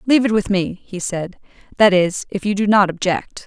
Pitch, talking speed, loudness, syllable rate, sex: 195 Hz, 225 wpm, -18 LUFS, 5.2 syllables/s, female